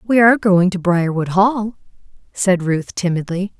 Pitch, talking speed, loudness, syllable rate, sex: 190 Hz, 150 wpm, -16 LUFS, 4.4 syllables/s, female